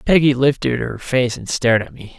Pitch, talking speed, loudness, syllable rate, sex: 125 Hz, 220 wpm, -18 LUFS, 5.3 syllables/s, male